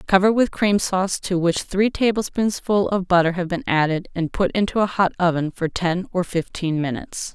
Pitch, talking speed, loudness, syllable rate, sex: 185 Hz, 195 wpm, -21 LUFS, 5.1 syllables/s, female